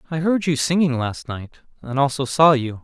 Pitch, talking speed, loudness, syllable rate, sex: 140 Hz, 210 wpm, -19 LUFS, 5.1 syllables/s, male